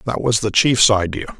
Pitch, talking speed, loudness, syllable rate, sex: 110 Hz, 215 wpm, -16 LUFS, 4.8 syllables/s, male